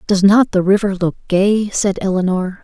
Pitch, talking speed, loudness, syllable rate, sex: 195 Hz, 180 wpm, -15 LUFS, 4.7 syllables/s, female